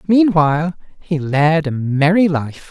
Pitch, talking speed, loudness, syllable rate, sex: 160 Hz, 135 wpm, -16 LUFS, 3.9 syllables/s, male